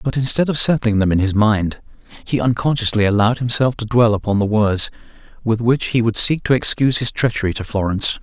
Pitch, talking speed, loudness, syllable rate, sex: 115 Hz, 205 wpm, -17 LUFS, 6.0 syllables/s, male